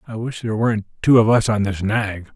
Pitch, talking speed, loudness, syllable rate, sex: 110 Hz, 255 wpm, -19 LUFS, 6.1 syllables/s, male